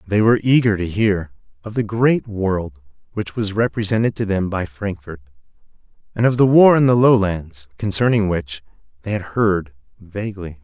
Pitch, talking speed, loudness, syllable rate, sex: 100 Hz, 165 wpm, -18 LUFS, 4.9 syllables/s, male